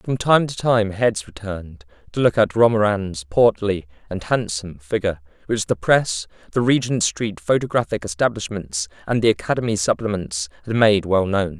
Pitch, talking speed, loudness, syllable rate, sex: 105 Hz, 160 wpm, -20 LUFS, 5.1 syllables/s, male